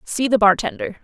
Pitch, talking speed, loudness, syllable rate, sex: 245 Hz, 175 wpm, -18 LUFS, 5.4 syllables/s, female